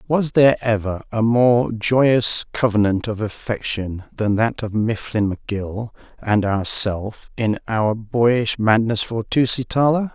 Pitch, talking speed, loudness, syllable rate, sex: 110 Hz, 130 wpm, -19 LUFS, 4.0 syllables/s, male